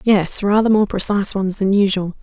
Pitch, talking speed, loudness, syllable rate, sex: 200 Hz, 190 wpm, -16 LUFS, 5.3 syllables/s, female